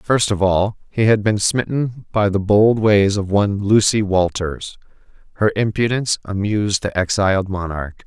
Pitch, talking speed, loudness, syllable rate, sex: 100 Hz, 155 wpm, -18 LUFS, 4.6 syllables/s, male